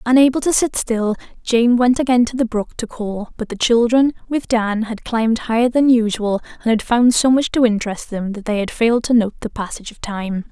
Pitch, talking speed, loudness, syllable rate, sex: 230 Hz, 230 wpm, -17 LUFS, 5.4 syllables/s, female